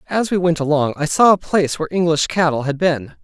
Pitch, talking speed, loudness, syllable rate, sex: 160 Hz, 240 wpm, -17 LUFS, 6.1 syllables/s, male